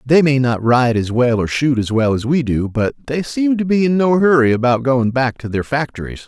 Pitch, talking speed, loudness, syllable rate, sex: 130 Hz, 260 wpm, -16 LUFS, 5.1 syllables/s, male